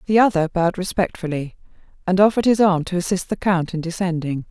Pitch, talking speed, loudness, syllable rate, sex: 180 Hz, 185 wpm, -20 LUFS, 6.3 syllables/s, female